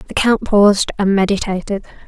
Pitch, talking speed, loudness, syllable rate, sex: 200 Hz, 145 wpm, -15 LUFS, 5.1 syllables/s, female